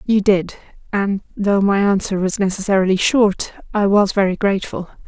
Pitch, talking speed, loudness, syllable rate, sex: 200 Hz, 140 wpm, -17 LUFS, 5.0 syllables/s, female